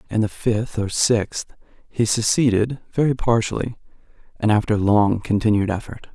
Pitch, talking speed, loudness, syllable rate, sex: 110 Hz, 135 wpm, -20 LUFS, 4.7 syllables/s, male